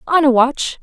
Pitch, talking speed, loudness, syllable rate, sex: 280 Hz, 215 wpm, -14 LUFS, 4.6 syllables/s, female